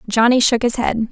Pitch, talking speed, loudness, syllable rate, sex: 235 Hz, 215 wpm, -15 LUFS, 5.8 syllables/s, female